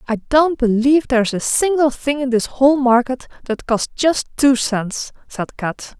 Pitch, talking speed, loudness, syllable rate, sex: 255 Hz, 180 wpm, -17 LUFS, 4.5 syllables/s, female